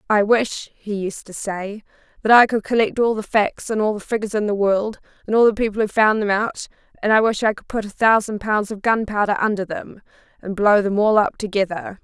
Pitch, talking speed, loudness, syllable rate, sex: 210 Hz, 235 wpm, -19 LUFS, 5.5 syllables/s, female